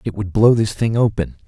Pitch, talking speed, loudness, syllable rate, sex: 110 Hz, 245 wpm, -17 LUFS, 5.4 syllables/s, male